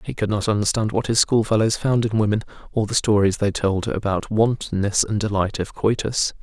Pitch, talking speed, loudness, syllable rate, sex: 105 Hz, 195 wpm, -21 LUFS, 5.4 syllables/s, male